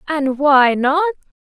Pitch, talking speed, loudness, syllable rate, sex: 290 Hz, 125 wpm, -15 LUFS, 3.4 syllables/s, female